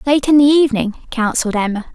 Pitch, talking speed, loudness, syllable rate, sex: 255 Hz, 185 wpm, -15 LUFS, 6.8 syllables/s, female